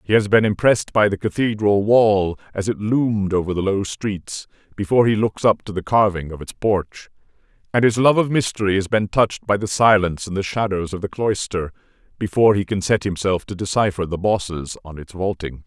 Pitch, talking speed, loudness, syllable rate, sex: 100 Hz, 205 wpm, -19 LUFS, 5.5 syllables/s, male